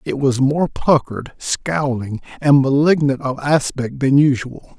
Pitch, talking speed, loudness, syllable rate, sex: 135 Hz, 140 wpm, -17 LUFS, 4.0 syllables/s, male